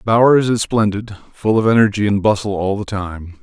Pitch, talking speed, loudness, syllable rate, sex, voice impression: 105 Hz, 195 wpm, -16 LUFS, 5.1 syllables/s, male, masculine, very adult-like, slightly thick, cool, calm, slightly elegant